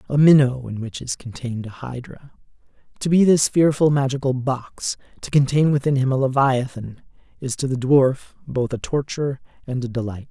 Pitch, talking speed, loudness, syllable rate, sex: 135 Hz, 175 wpm, -20 LUFS, 5.3 syllables/s, male